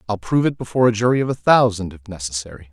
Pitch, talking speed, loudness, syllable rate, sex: 105 Hz, 245 wpm, -19 LUFS, 7.7 syllables/s, male